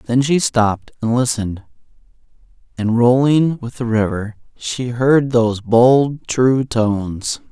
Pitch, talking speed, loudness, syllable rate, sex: 120 Hz, 130 wpm, -16 LUFS, 3.8 syllables/s, male